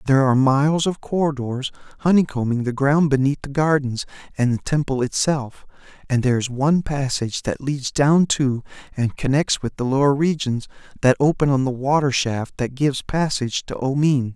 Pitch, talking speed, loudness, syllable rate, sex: 135 Hz, 170 wpm, -20 LUFS, 5.4 syllables/s, male